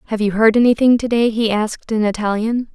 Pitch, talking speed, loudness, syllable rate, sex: 220 Hz, 220 wpm, -16 LUFS, 6.0 syllables/s, female